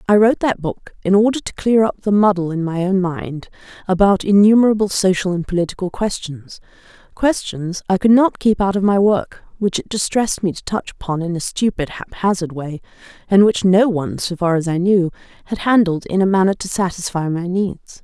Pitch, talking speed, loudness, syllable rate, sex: 190 Hz, 200 wpm, -17 LUFS, 5.4 syllables/s, female